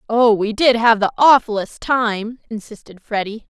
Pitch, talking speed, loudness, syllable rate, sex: 225 Hz, 150 wpm, -16 LUFS, 4.5 syllables/s, female